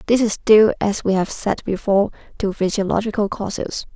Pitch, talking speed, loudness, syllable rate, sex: 205 Hz, 165 wpm, -19 LUFS, 5.4 syllables/s, female